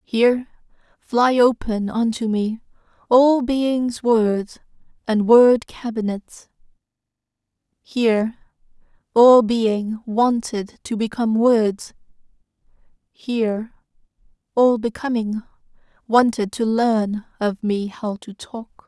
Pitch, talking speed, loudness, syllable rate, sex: 225 Hz, 90 wpm, -19 LUFS, 3.3 syllables/s, female